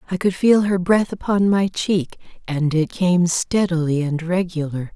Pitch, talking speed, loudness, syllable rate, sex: 175 Hz, 170 wpm, -19 LUFS, 4.3 syllables/s, female